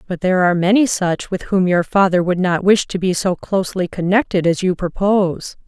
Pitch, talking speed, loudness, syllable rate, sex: 185 Hz, 210 wpm, -17 LUFS, 5.5 syllables/s, female